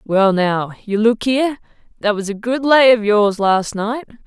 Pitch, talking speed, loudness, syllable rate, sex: 220 Hz, 195 wpm, -16 LUFS, 4.4 syllables/s, female